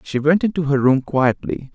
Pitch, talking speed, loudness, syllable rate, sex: 145 Hz, 205 wpm, -18 LUFS, 4.9 syllables/s, male